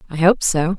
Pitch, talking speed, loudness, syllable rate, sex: 175 Hz, 230 wpm, -17 LUFS, 5.1 syllables/s, female